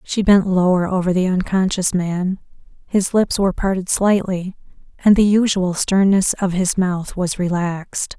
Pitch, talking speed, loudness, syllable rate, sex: 185 Hz, 155 wpm, -18 LUFS, 4.5 syllables/s, female